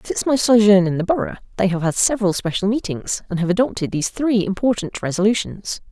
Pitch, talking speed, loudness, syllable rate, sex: 200 Hz, 195 wpm, -19 LUFS, 6.2 syllables/s, female